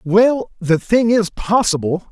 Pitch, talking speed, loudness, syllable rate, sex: 200 Hz, 140 wpm, -16 LUFS, 3.7 syllables/s, male